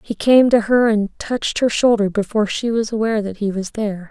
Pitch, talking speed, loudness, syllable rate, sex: 215 Hz, 235 wpm, -17 LUFS, 5.7 syllables/s, female